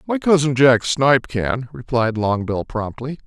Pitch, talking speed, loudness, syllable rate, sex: 130 Hz, 145 wpm, -18 LUFS, 4.3 syllables/s, male